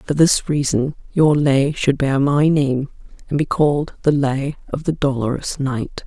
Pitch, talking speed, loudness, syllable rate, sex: 140 Hz, 180 wpm, -18 LUFS, 4.2 syllables/s, female